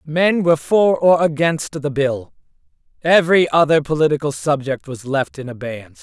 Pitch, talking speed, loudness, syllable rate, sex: 150 Hz, 140 wpm, -17 LUFS, 5.0 syllables/s, male